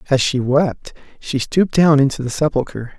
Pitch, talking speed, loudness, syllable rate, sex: 140 Hz, 180 wpm, -17 LUFS, 5.2 syllables/s, male